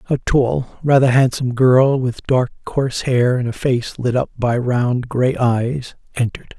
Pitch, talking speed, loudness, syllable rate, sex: 125 Hz, 175 wpm, -17 LUFS, 4.2 syllables/s, male